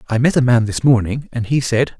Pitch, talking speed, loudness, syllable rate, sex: 120 Hz, 270 wpm, -16 LUFS, 5.8 syllables/s, male